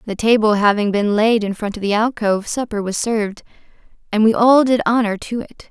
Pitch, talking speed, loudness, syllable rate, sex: 215 Hz, 210 wpm, -17 LUFS, 5.6 syllables/s, female